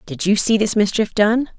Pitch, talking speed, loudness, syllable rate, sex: 210 Hz, 230 wpm, -17 LUFS, 5.0 syllables/s, female